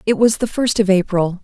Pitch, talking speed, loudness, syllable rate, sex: 200 Hz, 250 wpm, -16 LUFS, 5.4 syllables/s, female